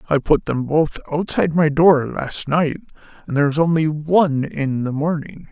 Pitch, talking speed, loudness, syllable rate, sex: 150 Hz, 185 wpm, -19 LUFS, 4.9 syllables/s, male